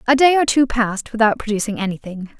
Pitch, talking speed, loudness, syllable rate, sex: 230 Hz, 200 wpm, -17 LUFS, 6.4 syllables/s, female